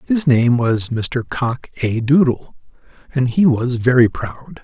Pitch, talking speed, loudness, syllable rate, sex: 125 Hz, 155 wpm, -17 LUFS, 3.7 syllables/s, male